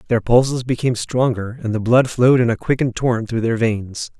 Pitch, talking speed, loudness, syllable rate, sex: 120 Hz, 215 wpm, -18 LUFS, 5.9 syllables/s, male